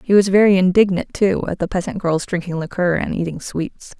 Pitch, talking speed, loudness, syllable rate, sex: 185 Hz, 210 wpm, -18 LUFS, 5.4 syllables/s, female